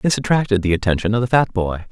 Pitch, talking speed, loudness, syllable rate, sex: 110 Hz, 250 wpm, -18 LUFS, 6.5 syllables/s, male